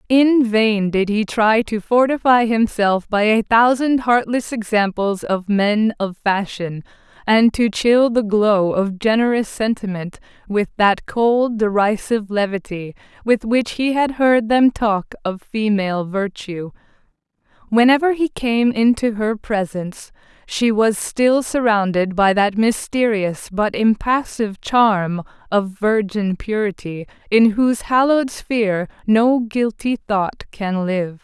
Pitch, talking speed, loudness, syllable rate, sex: 215 Hz, 130 wpm, -18 LUFS, 3.9 syllables/s, female